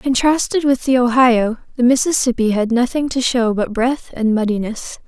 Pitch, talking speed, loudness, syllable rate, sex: 245 Hz, 165 wpm, -16 LUFS, 4.8 syllables/s, female